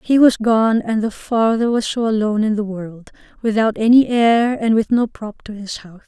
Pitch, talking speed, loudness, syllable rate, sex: 220 Hz, 215 wpm, -17 LUFS, 5.0 syllables/s, female